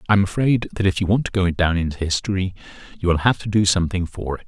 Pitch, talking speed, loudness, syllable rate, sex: 95 Hz, 255 wpm, -20 LUFS, 6.6 syllables/s, male